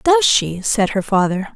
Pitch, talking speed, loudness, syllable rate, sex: 210 Hz, 195 wpm, -16 LUFS, 4.1 syllables/s, female